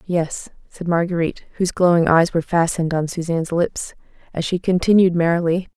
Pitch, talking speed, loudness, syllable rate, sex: 170 Hz, 155 wpm, -19 LUFS, 5.9 syllables/s, female